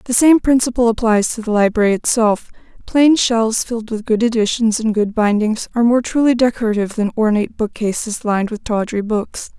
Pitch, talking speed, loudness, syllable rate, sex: 225 Hz, 175 wpm, -16 LUFS, 5.7 syllables/s, female